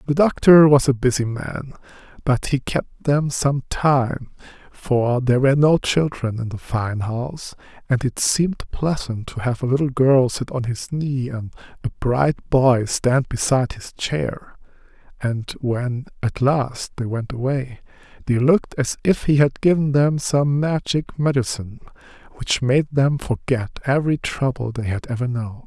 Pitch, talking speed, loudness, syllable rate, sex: 130 Hz, 165 wpm, -20 LUFS, 4.3 syllables/s, male